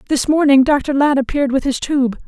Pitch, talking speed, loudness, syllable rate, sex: 275 Hz, 210 wpm, -15 LUFS, 5.5 syllables/s, female